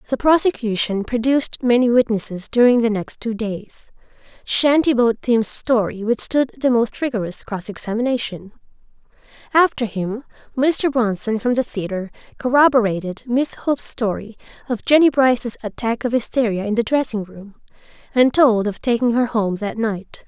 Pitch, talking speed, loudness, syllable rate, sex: 235 Hz, 145 wpm, -19 LUFS, 4.9 syllables/s, female